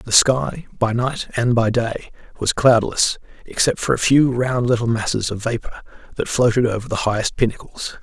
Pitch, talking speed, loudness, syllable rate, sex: 115 Hz, 170 wpm, -19 LUFS, 5.1 syllables/s, male